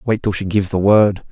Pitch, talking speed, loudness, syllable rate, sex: 100 Hz, 275 wpm, -16 LUFS, 5.9 syllables/s, male